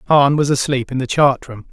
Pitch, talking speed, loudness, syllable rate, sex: 135 Hz, 245 wpm, -16 LUFS, 5.3 syllables/s, male